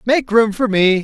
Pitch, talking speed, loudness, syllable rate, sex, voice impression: 220 Hz, 230 wpm, -15 LUFS, 4.4 syllables/s, male, masculine, slightly old, slightly powerful, soft, halting, raspy, calm, mature, friendly, slightly reassuring, wild, lively, kind